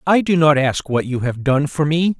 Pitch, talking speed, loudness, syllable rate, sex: 150 Hz, 275 wpm, -17 LUFS, 4.8 syllables/s, male